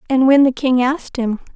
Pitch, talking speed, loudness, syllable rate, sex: 260 Hz, 230 wpm, -16 LUFS, 5.6 syllables/s, female